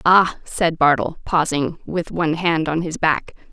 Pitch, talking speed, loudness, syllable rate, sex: 165 Hz, 170 wpm, -19 LUFS, 4.3 syllables/s, female